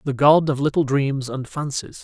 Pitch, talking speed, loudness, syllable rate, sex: 140 Hz, 205 wpm, -20 LUFS, 1.5 syllables/s, male